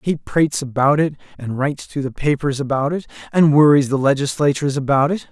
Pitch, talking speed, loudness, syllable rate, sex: 145 Hz, 190 wpm, -18 LUFS, 5.7 syllables/s, male